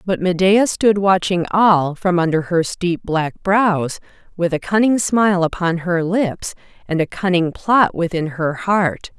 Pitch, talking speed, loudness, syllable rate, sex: 180 Hz, 165 wpm, -17 LUFS, 4.0 syllables/s, female